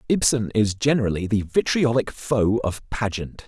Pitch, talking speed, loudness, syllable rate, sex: 110 Hz, 140 wpm, -22 LUFS, 4.6 syllables/s, male